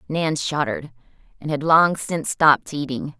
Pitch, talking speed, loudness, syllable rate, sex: 150 Hz, 150 wpm, -20 LUFS, 5.1 syllables/s, female